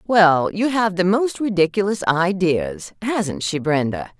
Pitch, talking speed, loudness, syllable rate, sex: 180 Hz, 145 wpm, -19 LUFS, 3.9 syllables/s, female